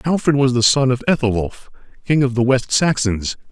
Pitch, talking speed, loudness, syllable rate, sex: 130 Hz, 190 wpm, -17 LUFS, 5.2 syllables/s, male